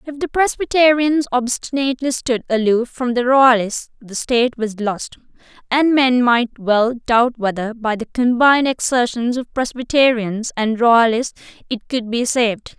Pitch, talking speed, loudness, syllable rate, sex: 245 Hz, 145 wpm, -17 LUFS, 4.4 syllables/s, female